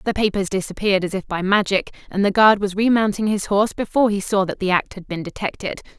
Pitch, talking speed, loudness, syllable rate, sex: 200 Hz, 230 wpm, -20 LUFS, 6.4 syllables/s, female